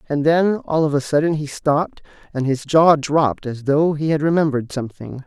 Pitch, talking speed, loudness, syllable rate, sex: 145 Hz, 205 wpm, -19 LUFS, 5.4 syllables/s, male